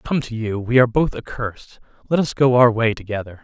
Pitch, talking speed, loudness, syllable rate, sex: 120 Hz, 245 wpm, -19 LUFS, 6.6 syllables/s, male